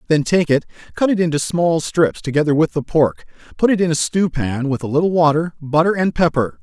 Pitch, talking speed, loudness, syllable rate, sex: 155 Hz, 225 wpm, -17 LUFS, 5.6 syllables/s, male